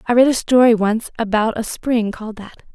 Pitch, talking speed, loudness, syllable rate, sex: 225 Hz, 220 wpm, -17 LUFS, 5.3 syllables/s, female